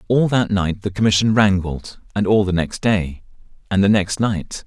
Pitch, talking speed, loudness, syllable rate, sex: 100 Hz, 195 wpm, -18 LUFS, 4.7 syllables/s, male